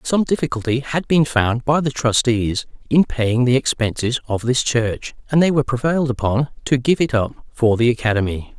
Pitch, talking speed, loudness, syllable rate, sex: 125 Hz, 190 wpm, -18 LUFS, 5.2 syllables/s, male